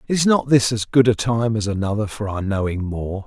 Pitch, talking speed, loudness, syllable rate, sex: 110 Hz, 240 wpm, -20 LUFS, 5.1 syllables/s, male